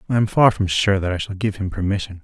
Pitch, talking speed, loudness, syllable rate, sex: 100 Hz, 295 wpm, -20 LUFS, 6.3 syllables/s, male